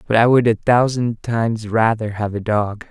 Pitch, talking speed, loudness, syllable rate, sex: 110 Hz, 205 wpm, -18 LUFS, 4.8 syllables/s, male